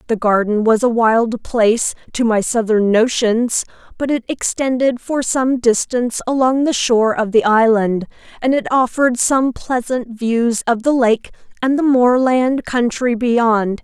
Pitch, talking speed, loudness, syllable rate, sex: 240 Hz, 155 wpm, -16 LUFS, 4.2 syllables/s, female